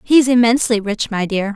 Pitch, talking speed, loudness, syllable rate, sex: 225 Hz, 195 wpm, -16 LUFS, 5.5 syllables/s, female